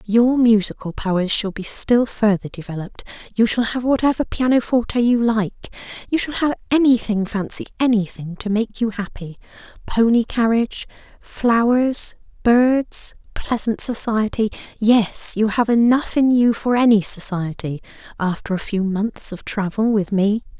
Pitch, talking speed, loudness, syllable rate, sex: 220 Hz, 135 wpm, -19 LUFS, 4.5 syllables/s, female